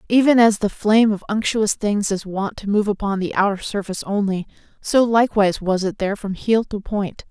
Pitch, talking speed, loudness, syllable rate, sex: 205 Hz, 205 wpm, -19 LUFS, 5.5 syllables/s, female